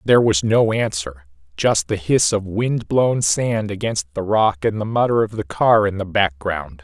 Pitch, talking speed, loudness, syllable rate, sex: 100 Hz, 195 wpm, -19 LUFS, 4.4 syllables/s, male